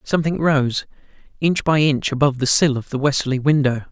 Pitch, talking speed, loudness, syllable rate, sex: 140 Hz, 185 wpm, -18 LUFS, 5.9 syllables/s, male